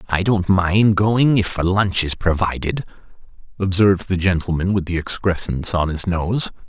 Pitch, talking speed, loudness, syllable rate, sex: 95 Hz, 160 wpm, -19 LUFS, 4.8 syllables/s, male